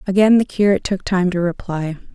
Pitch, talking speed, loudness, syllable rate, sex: 190 Hz, 195 wpm, -18 LUFS, 6.0 syllables/s, female